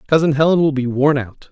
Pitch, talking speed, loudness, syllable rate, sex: 145 Hz, 240 wpm, -16 LUFS, 5.8 syllables/s, male